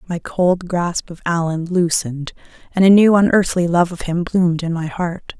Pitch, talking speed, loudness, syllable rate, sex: 175 Hz, 190 wpm, -17 LUFS, 4.8 syllables/s, female